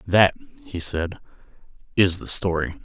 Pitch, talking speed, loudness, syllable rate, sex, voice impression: 85 Hz, 125 wpm, -22 LUFS, 4.2 syllables/s, male, masculine, adult-like, tensed, powerful, slightly dark, slightly soft, clear, sincere, calm, mature, slightly friendly, wild, kind, slightly modest